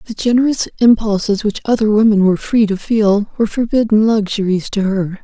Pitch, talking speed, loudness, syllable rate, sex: 215 Hz, 170 wpm, -14 LUFS, 5.6 syllables/s, female